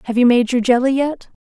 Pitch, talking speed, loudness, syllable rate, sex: 250 Hz, 245 wpm, -16 LUFS, 6.0 syllables/s, female